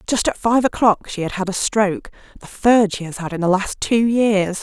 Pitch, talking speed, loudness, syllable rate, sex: 205 Hz, 245 wpm, -18 LUFS, 5.1 syllables/s, female